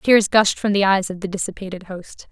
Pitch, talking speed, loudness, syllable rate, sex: 195 Hz, 235 wpm, -19 LUFS, 5.3 syllables/s, female